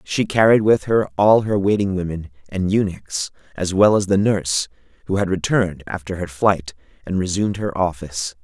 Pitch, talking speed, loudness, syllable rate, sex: 95 Hz, 180 wpm, -19 LUFS, 5.2 syllables/s, male